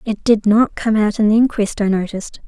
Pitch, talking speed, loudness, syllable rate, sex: 215 Hz, 240 wpm, -16 LUFS, 5.6 syllables/s, female